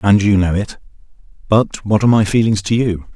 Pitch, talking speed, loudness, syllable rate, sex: 105 Hz, 210 wpm, -15 LUFS, 5.4 syllables/s, male